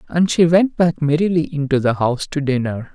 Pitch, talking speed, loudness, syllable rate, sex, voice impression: 155 Hz, 205 wpm, -17 LUFS, 5.4 syllables/s, male, masculine, slightly feminine, very gender-neutral, very adult-like, slightly middle-aged, slightly thick, slightly relaxed, weak, slightly dark, very soft, slightly muffled, fluent, intellectual, slightly refreshing, very sincere, very calm, slightly mature, slightly friendly, reassuring, very unique, elegant, slightly wild, sweet, very kind, modest